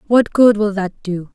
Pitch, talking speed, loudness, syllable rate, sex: 205 Hz, 225 wpm, -16 LUFS, 4.3 syllables/s, female